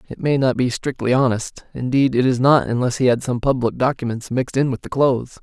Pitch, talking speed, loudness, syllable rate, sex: 125 Hz, 230 wpm, -19 LUFS, 5.9 syllables/s, male